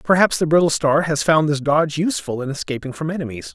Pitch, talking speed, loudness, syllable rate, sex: 150 Hz, 220 wpm, -19 LUFS, 6.4 syllables/s, male